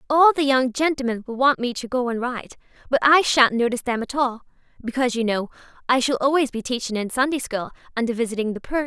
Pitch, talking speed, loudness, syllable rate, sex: 250 Hz, 225 wpm, -21 LUFS, 6.1 syllables/s, female